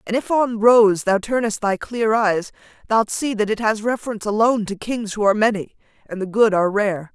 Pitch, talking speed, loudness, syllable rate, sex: 215 Hz, 210 wpm, -19 LUFS, 5.4 syllables/s, female